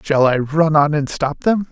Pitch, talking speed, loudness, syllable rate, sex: 150 Hz, 245 wpm, -16 LUFS, 4.4 syllables/s, male